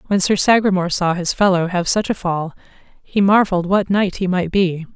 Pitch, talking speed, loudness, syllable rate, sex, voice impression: 185 Hz, 205 wpm, -17 LUFS, 5.4 syllables/s, female, feminine, adult-like, slightly fluent, intellectual, slightly calm